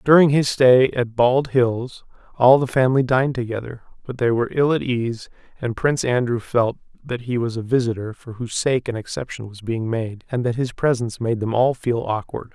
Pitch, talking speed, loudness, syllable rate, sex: 120 Hz, 205 wpm, -20 LUFS, 5.3 syllables/s, male